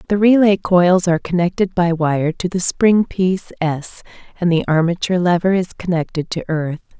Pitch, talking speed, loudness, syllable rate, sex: 175 Hz, 170 wpm, -17 LUFS, 5.2 syllables/s, female